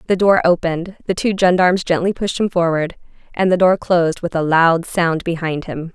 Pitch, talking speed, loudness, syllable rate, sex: 175 Hz, 200 wpm, -17 LUFS, 5.4 syllables/s, female